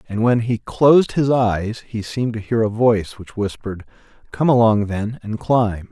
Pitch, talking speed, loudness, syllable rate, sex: 115 Hz, 195 wpm, -18 LUFS, 4.8 syllables/s, male